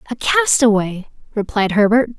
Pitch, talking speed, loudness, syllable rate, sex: 220 Hz, 110 wpm, -16 LUFS, 4.8 syllables/s, female